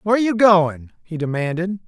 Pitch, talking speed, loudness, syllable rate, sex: 180 Hz, 160 wpm, -18 LUFS, 5.6 syllables/s, male